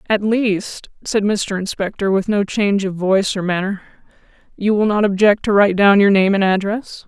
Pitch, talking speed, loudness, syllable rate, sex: 200 Hz, 195 wpm, -16 LUFS, 5.2 syllables/s, female